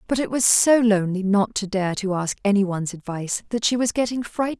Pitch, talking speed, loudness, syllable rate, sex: 210 Hz, 220 wpm, -21 LUFS, 6.0 syllables/s, female